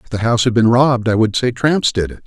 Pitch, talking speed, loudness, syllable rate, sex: 120 Hz, 320 wpm, -15 LUFS, 6.5 syllables/s, male